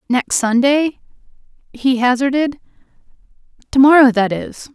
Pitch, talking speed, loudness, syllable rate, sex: 260 Hz, 100 wpm, -15 LUFS, 4.4 syllables/s, female